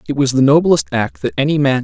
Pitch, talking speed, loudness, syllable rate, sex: 140 Hz, 260 wpm, -14 LUFS, 5.9 syllables/s, male